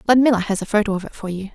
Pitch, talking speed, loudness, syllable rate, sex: 210 Hz, 310 wpm, -20 LUFS, 8.1 syllables/s, female